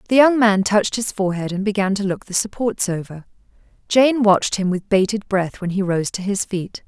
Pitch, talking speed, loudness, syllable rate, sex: 200 Hz, 220 wpm, -19 LUFS, 5.4 syllables/s, female